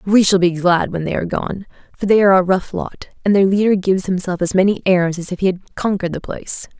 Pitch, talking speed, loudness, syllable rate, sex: 185 Hz, 255 wpm, -17 LUFS, 6.2 syllables/s, female